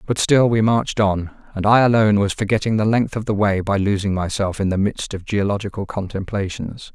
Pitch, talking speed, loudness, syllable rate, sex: 105 Hz, 205 wpm, -19 LUFS, 5.6 syllables/s, male